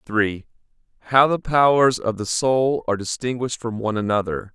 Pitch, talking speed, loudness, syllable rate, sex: 120 Hz, 160 wpm, -20 LUFS, 5.8 syllables/s, male